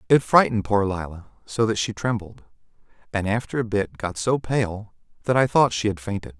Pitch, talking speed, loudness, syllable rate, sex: 105 Hz, 195 wpm, -23 LUFS, 5.4 syllables/s, male